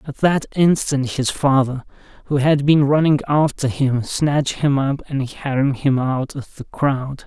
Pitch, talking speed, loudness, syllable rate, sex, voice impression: 140 Hz, 175 wpm, -18 LUFS, 4.2 syllables/s, male, masculine, adult-like, powerful, bright, muffled, raspy, nasal, intellectual, slightly calm, mature, friendly, unique, wild, slightly lively, slightly intense